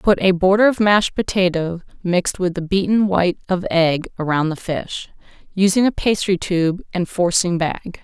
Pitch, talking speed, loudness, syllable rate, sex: 185 Hz, 170 wpm, -18 LUFS, 4.7 syllables/s, female